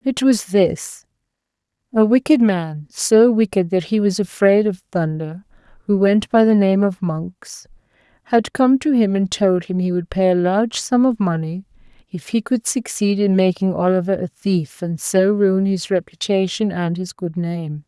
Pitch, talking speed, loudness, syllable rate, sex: 195 Hz, 175 wpm, -18 LUFS, 4.4 syllables/s, female